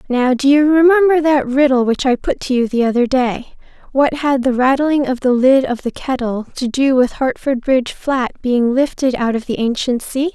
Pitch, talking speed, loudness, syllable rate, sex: 260 Hz, 210 wpm, -15 LUFS, 4.9 syllables/s, female